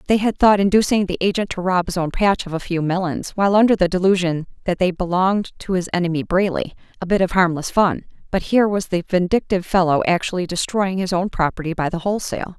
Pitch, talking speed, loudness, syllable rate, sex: 185 Hz, 215 wpm, -19 LUFS, 6.3 syllables/s, female